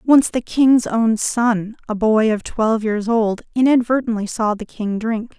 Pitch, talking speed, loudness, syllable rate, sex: 225 Hz, 180 wpm, -18 LUFS, 4.1 syllables/s, female